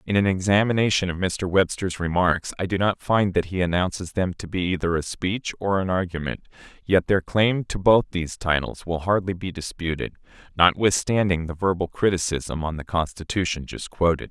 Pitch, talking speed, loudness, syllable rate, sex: 90 Hz, 180 wpm, -23 LUFS, 5.2 syllables/s, male